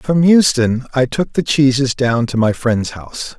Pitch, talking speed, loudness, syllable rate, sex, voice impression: 130 Hz, 195 wpm, -15 LUFS, 4.3 syllables/s, male, masculine, middle-aged, thick, powerful, slightly bright, slightly cool, sincere, calm, mature, friendly, reassuring, wild, lively, slightly strict